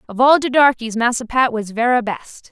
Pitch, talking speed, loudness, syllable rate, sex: 240 Hz, 215 wpm, -16 LUFS, 5.1 syllables/s, female